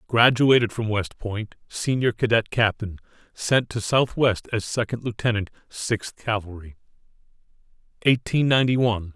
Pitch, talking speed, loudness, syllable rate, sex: 110 Hz, 120 wpm, -23 LUFS, 4.7 syllables/s, male